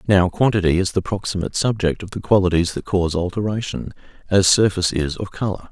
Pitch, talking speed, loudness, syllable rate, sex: 95 Hz, 180 wpm, -19 LUFS, 6.2 syllables/s, male